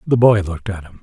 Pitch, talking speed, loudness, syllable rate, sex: 100 Hz, 295 wpm, -16 LUFS, 6.6 syllables/s, male